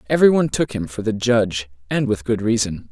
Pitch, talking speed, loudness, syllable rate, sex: 110 Hz, 225 wpm, -20 LUFS, 6.3 syllables/s, male